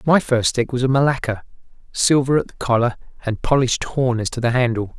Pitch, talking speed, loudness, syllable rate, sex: 125 Hz, 205 wpm, -19 LUFS, 5.8 syllables/s, male